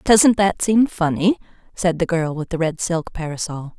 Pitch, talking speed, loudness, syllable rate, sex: 175 Hz, 190 wpm, -19 LUFS, 4.6 syllables/s, female